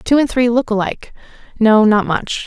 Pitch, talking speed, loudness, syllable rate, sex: 225 Hz, 170 wpm, -15 LUFS, 5.1 syllables/s, female